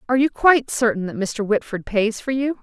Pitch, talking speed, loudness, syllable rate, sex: 235 Hz, 230 wpm, -20 LUFS, 5.7 syllables/s, female